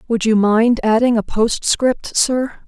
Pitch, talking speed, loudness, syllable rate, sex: 230 Hz, 155 wpm, -16 LUFS, 3.7 syllables/s, female